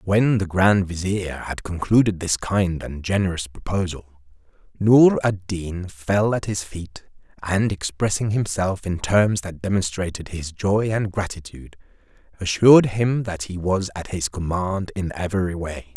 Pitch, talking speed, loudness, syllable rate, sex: 95 Hz, 150 wpm, -22 LUFS, 4.3 syllables/s, male